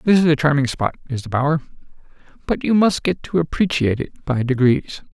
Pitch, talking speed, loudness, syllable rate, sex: 145 Hz, 200 wpm, -19 LUFS, 5.6 syllables/s, male